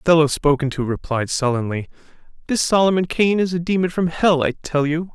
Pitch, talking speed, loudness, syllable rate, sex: 160 Hz, 200 wpm, -19 LUFS, 5.7 syllables/s, male